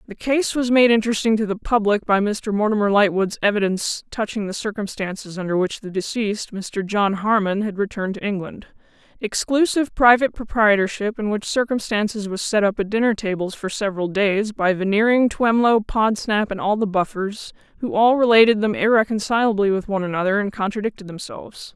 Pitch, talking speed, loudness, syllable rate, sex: 210 Hz, 170 wpm, -20 LUFS, 5.7 syllables/s, female